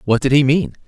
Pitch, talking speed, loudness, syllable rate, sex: 135 Hz, 275 wpm, -15 LUFS, 5.9 syllables/s, male